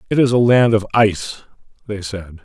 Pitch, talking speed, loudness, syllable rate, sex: 105 Hz, 195 wpm, -16 LUFS, 5.5 syllables/s, male